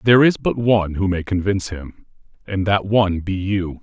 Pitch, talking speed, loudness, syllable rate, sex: 100 Hz, 205 wpm, -19 LUFS, 5.4 syllables/s, male